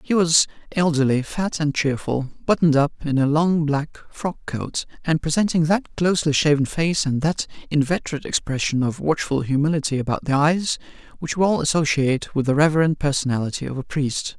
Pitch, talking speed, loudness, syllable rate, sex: 150 Hz, 165 wpm, -21 LUFS, 5.5 syllables/s, male